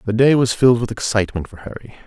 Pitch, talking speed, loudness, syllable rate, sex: 115 Hz, 230 wpm, -17 LUFS, 7.1 syllables/s, male